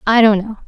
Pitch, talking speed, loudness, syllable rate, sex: 215 Hz, 270 wpm, -14 LUFS, 6.3 syllables/s, female